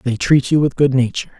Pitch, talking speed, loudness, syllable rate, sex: 135 Hz, 260 wpm, -16 LUFS, 6.1 syllables/s, male